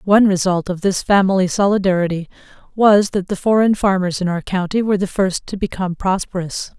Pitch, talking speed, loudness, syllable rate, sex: 190 Hz, 175 wpm, -17 LUFS, 5.8 syllables/s, female